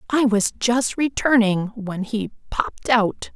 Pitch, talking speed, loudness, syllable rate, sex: 225 Hz, 145 wpm, -21 LUFS, 3.8 syllables/s, female